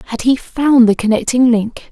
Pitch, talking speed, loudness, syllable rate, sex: 240 Hz, 190 wpm, -13 LUFS, 4.9 syllables/s, female